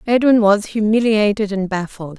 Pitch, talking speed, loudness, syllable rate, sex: 210 Hz, 135 wpm, -16 LUFS, 4.9 syllables/s, female